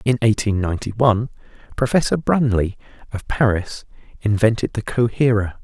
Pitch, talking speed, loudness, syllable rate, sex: 110 Hz, 115 wpm, -19 LUFS, 5.4 syllables/s, male